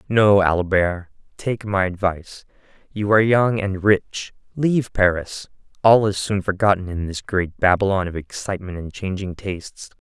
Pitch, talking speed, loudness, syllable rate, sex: 100 Hz, 140 wpm, -20 LUFS, 4.7 syllables/s, male